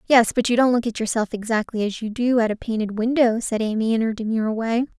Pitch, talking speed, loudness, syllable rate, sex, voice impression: 230 Hz, 255 wpm, -21 LUFS, 6.2 syllables/s, female, very feminine, very young, very thin, tensed, powerful, very bright, soft, very clear, fluent, slightly raspy, very cute, slightly intellectual, very refreshing, sincere, calm, very friendly, reassuring, very unique, elegant, slightly wild, very sweet, lively, very kind, slightly intense, sharp, modest, very light